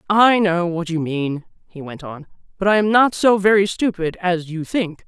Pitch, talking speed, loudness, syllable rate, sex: 180 Hz, 215 wpm, -18 LUFS, 4.7 syllables/s, female